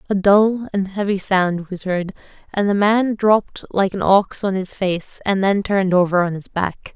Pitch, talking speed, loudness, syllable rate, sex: 195 Hz, 205 wpm, -18 LUFS, 4.5 syllables/s, female